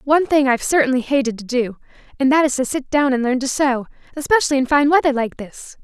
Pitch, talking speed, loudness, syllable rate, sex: 270 Hz, 235 wpm, -18 LUFS, 6.4 syllables/s, female